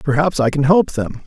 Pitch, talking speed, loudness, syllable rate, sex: 150 Hz, 235 wpm, -16 LUFS, 5.6 syllables/s, male